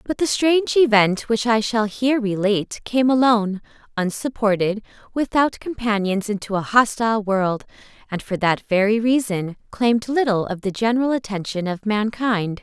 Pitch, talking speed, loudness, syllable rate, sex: 220 Hz, 145 wpm, -20 LUFS, 5.0 syllables/s, female